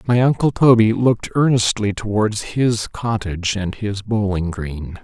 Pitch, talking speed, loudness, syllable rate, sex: 105 Hz, 145 wpm, -18 LUFS, 4.2 syllables/s, male